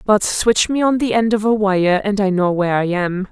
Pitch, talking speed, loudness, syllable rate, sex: 200 Hz, 270 wpm, -16 LUFS, 5.0 syllables/s, female